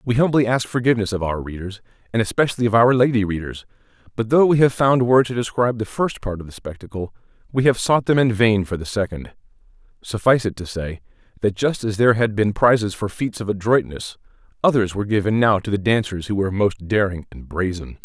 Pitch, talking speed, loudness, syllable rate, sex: 110 Hz, 215 wpm, -20 LUFS, 6.1 syllables/s, male